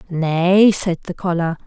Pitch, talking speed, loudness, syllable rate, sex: 175 Hz, 145 wpm, -17 LUFS, 3.5 syllables/s, female